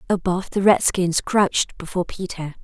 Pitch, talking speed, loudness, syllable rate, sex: 185 Hz, 135 wpm, -21 LUFS, 5.4 syllables/s, female